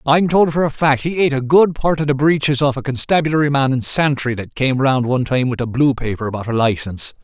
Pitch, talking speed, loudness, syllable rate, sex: 135 Hz, 255 wpm, -17 LUFS, 6.1 syllables/s, male